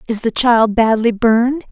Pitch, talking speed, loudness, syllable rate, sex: 230 Hz, 175 wpm, -14 LUFS, 4.7 syllables/s, female